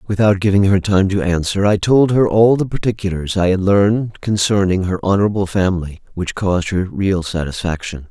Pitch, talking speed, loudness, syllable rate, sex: 95 Hz, 180 wpm, -16 LUFS, 5.4 syllables/s, male